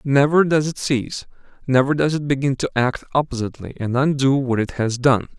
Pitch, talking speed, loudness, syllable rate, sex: 135 Hz, 190 wpm, -20 LUFS, 5.6 syllables/s, male